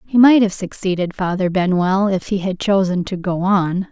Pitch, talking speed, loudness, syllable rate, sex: 190 Hz, 200 wpm, -17 LUFS, 4.8 syllables/s, female